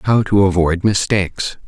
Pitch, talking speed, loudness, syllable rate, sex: 95 Hz, 145 wpm, -16 LUFS, 4.5 syllables/s, male